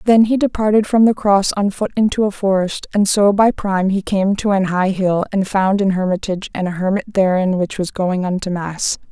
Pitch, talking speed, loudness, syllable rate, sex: 195 Hz, 225 wpm, -17 LUFS, 5.2 syllables/s, female